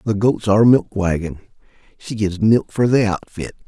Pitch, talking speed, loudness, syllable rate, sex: 105 Hz, 165 wpm, -17 LUFS, 4.9 syllables/s, male